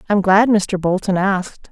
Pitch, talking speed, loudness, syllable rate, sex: 195 Hz, 175 wpm, -16 LUFS, 4.6 syllables/s, female